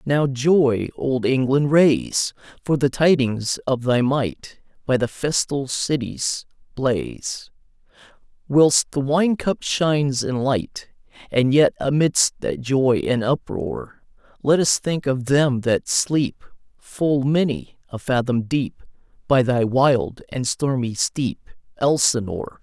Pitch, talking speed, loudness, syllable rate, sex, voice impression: 135 Hz, 130 wpm, -20 LUFS, 3.5 syllables/s, male, masculine, adult-like, clear, slightly refreshing, sincere, friendly, slightly unique